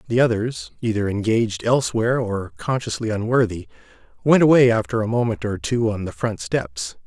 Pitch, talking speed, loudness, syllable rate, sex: 110 Hz, 145 wpm, -21 LUFS, 5.4 syllables/s, male